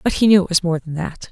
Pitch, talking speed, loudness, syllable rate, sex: 180 Hz, 365 wpm, -17 LUFS, 6.4 syllables/s, female